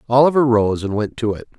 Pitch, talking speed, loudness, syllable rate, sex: 115 Hz, 225 wpm, -17 LUFS, 6.3 syllables/s, male